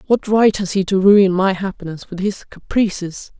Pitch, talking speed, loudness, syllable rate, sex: 195 Hz, 195 wpm, -16 LUFS, 4.8 syllables/s, female